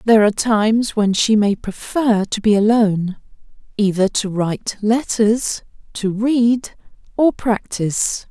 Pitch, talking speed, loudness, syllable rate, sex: 215 Hz, 130 wpm, -17 LUFS, 4.2 syllables/s, female